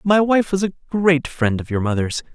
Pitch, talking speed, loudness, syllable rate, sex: 160 Hz, 230 wpm, -19 LUFS, 5.0 syllables/s, male